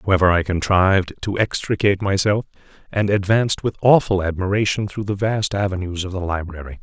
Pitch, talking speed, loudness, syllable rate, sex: 95 Hz, 160 wpm, -19 LUFS, 5.8 syllables/s, male